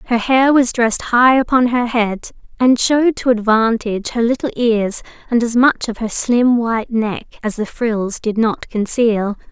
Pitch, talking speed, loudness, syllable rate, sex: 235 Hz, 185 wpm, -16 LUFS, 4.6 syllables/s, female